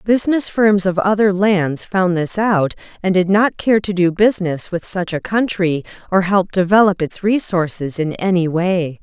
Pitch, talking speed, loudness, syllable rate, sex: 190 Hz, 180 wpm, -16 LUFS, 4.6 syllables/s, female